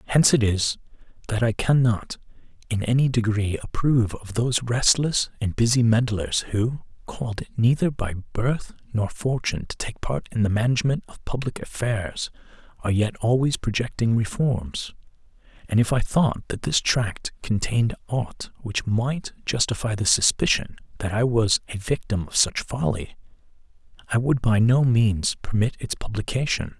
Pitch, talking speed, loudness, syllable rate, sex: 115 Hz, 150 wpm, -23 LUFS, 4.8 syllables/s, male